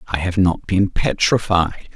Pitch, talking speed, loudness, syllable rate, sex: 90 Hz, 155 wpm, -18 LUFS, 3.9 syllables/s, male